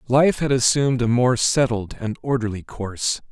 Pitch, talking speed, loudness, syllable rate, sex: 125 Hz, 165 wpm, -20 LUFS, 4.9 syllables/s, male